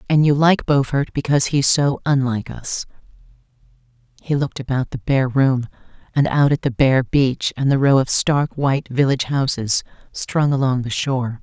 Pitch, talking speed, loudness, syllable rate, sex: 135 Hz, 175 wpm, -18 LUFS, 5.0 syllables/s, female